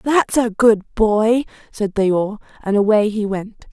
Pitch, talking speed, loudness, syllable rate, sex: 215 Hz, 175 wpm, -17 LUFS, 3.8 syllables/s, female